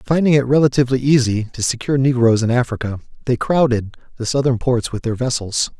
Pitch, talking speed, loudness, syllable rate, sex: 125 Hz, 175 wpm, -17 LUFS, 6.0 syllables/s, male